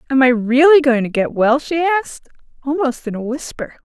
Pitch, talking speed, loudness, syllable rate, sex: 265 Hz, 200 wpm, -16 LUFS, 5.2 syllables/s, female